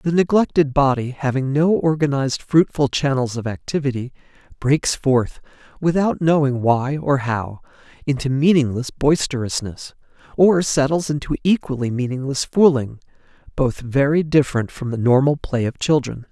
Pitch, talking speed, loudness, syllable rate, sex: 140 Hz, 125 wpm, -19 LUFS, 4.8 syllables/s, male